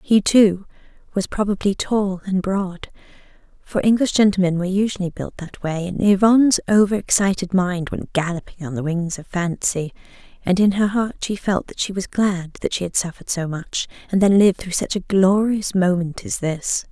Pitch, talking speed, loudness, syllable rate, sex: 190 Hz, 185 wpm, -20 LUFS, 5.1 syllables/s, female